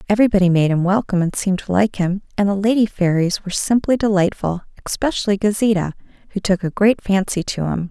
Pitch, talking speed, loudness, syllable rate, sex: 195 Hz, 190 wpm, -18 LUFS, 6.3 syllables/s, female